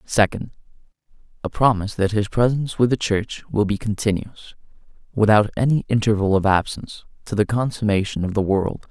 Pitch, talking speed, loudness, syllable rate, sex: 105 Hz, 150 wpm, -20 LUFS, 5.8 syllables/s, male